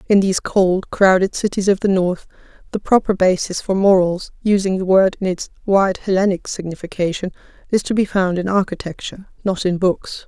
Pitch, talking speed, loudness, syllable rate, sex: 190 Hz, 175 wpm, -18 LUFS, 5.3 syllables/s, female